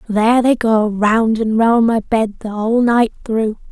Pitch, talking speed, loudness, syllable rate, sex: 225 Hz, 195 wpm, -15 LUFS, 4.2 syllables/s, female